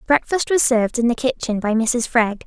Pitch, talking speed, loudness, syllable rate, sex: 240 Hz, 220 wpm, -19 LUFS, 5.2 syllables/s, female